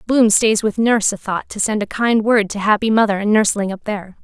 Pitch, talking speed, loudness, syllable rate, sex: 210 Hz, 255 wpm, -17 LUFS, 5.9 syllables/s, female